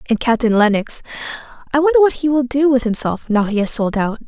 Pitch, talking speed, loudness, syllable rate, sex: 245 Hz, 210 wpm, -16 LUFS, 6.1 syllables/s, female